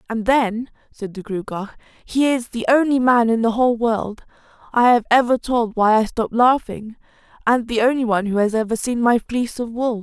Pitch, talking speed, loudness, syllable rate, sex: 230 Hz, 205 wpm, -18 LUFS, 5.3 syllables/s, female